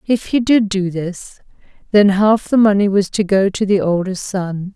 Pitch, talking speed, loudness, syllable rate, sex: 200 Hz, 200 wpm, -16 LUFS, 4.4 syllables/s, female